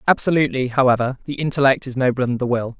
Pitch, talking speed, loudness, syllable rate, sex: 130 Hz, 195 wpm, -19 LUFS, 7.0 syllables/s, male